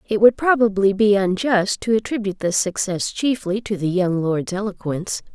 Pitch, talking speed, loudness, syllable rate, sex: 205 Hz, 170 wpm, -20 LUFS, 5.1 syllables/s, female